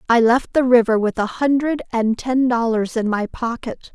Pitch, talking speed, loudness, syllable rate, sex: 240 Hz, 200 wpm, -18 LUFS, 4.6 syllables/s, female